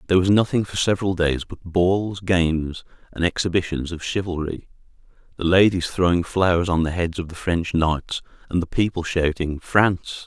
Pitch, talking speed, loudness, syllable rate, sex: 90 Hz, 170 wpm, -22 LUFS, 5.2 syllables/s, male